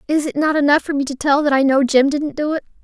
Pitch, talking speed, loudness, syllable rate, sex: 285 Hz, 315 wpm, -17 LUFS, 6.4 syllables/s, female